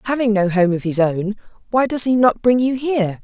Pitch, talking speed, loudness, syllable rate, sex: 220 Hz, 240 wpm, -17 LUFS, 5.5 syllables/s, female